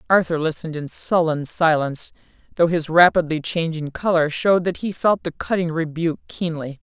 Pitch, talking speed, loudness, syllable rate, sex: 165 Hz, 155 wpm, -20 LUFS, 5.4 syllables/s, female